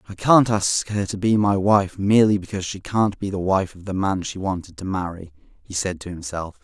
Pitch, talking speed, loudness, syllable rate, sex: 95 Hz, 235 wpm, -21 LUFS, 5.2 syllables/s, male